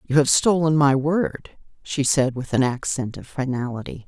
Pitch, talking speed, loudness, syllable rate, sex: 135 Hz, 175 wpm, -21 LUFS, 4.6 syllables/s, female